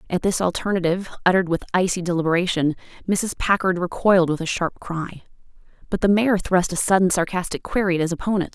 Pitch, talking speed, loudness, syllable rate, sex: 180 Hz, 175 wpm, -21 LUFS, 6.3 syllables/s, female